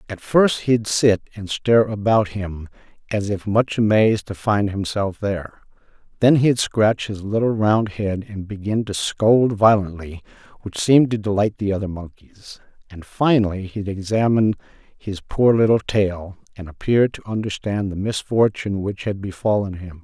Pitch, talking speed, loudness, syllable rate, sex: 105 Hz, 160 wpm, -20 LUFS, 4.7 syllables/s, male